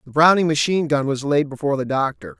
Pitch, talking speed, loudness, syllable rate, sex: 145 Hz, 200 wpm, -19 LUFS, 6.6 syllables/s, male